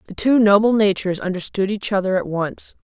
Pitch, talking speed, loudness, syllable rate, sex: 200 Hz, 190 wpm, -18 LUFS, 5.8 syllables/s, female